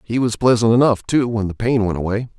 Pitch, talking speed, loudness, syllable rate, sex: 110 Hz, 250 wpm, -17 LUFS, 5.9 syllables/s, male